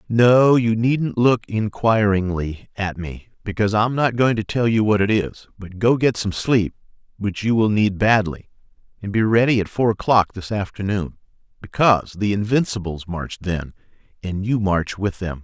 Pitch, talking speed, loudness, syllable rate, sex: 105 Hz, 175 wpm, -20 LUFS, 4.7 syllables/s, male